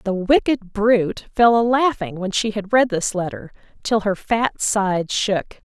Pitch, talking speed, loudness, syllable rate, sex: 210 Hz, 180 wpm, -19 LUFS, 4.3 syllables/s, female